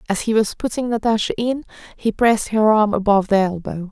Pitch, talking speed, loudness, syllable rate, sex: 215 Hz, 200 wpm, -19 LUFS, 6.0 syllables/s, female